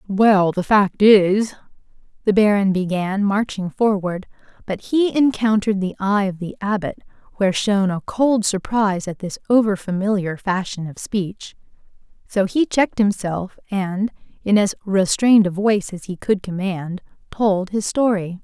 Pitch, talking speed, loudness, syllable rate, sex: 200 Hz, 150 wpm, -19 LUFS, 4.6 syllables/s, female